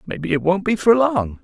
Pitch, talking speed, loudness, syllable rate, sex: 175 Hz, 250 wpm, -18 LUFS, 5.4 syllables/s, male